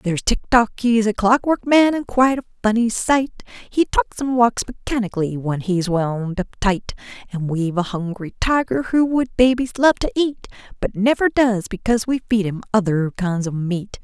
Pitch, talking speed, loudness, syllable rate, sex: 220 Hz, 185 wpm, -19 LUFS, 4.9 syllables/s, female